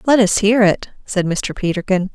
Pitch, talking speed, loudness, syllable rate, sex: 200 Hz, 195 wpm, -17 LUFS, 4.7 syllables/s, female